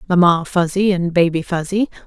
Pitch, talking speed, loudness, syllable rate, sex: 180 Hz, 145 wpm, -17 LUFS, 5.2 syllables/s, female